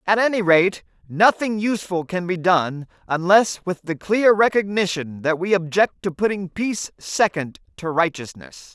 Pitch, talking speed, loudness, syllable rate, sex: 185 Hz, 150 wpm, -20 LUFS, 4.5 syllables/s, male